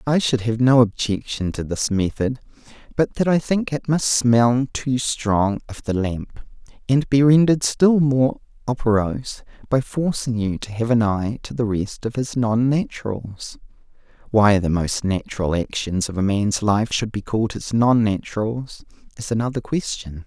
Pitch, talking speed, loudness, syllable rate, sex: 115 Hz, 165 wpm, -20 LUFS, 4.5 syllables/s, male